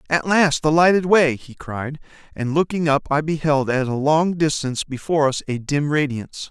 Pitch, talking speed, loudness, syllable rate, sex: 150 Hz, 195 wpm, -19 LUFS, 5.1 syllables/s, male